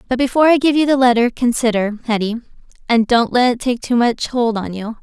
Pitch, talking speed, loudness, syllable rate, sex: 240 Hz, 225 wpm, -16 LUFS, 6.0 syllables/s, female